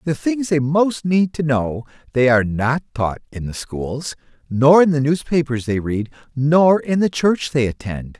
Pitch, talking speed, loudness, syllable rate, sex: 145 Hz, 190 wpm, -18 LUFS, 4.3 syllables/s, male